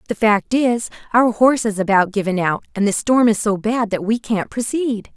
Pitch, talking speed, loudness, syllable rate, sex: 220 Hz, 220 wpm, -18 LUFS, 5.0 syllables/s, female